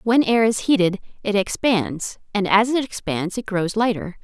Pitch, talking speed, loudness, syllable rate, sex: 205 Hz, 185 wpm, -20 LUFS, 4.6 syllables/s, female